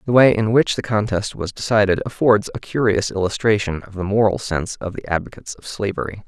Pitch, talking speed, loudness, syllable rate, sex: 105 Hz, 200 wpm, -19 LUFS, 6.0 syllables/s, male